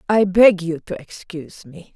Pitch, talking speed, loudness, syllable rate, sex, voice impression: 180 Hz, 185 wpm, -16 LUFS, 4.5 syllables/s, female, slightly feminine, adult-like, slightly cool, calm, elegant